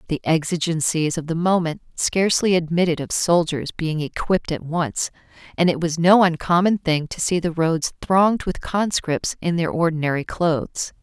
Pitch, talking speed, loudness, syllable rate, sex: 165 Hz, 165 wpm, -21 LUFS, 4.9 syllables/s, female